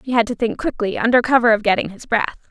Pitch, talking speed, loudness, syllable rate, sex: 230 Hz, 265 wpm, -18 LUFS, 6.9 syllables/s, female